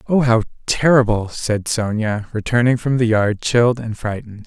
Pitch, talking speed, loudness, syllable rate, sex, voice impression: 115 Hz, 160 wpm, -18 LUFS, 4.9 syllables/s, male, masculine, very adult-like, slightly halting, calm, slightly reassuring, slightly modest